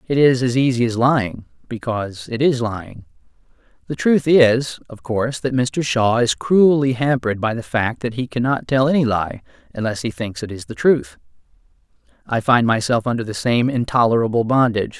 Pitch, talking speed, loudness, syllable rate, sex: 125 Hz, 180 wpm, -18 LUFS, 5.3 syllables/s, male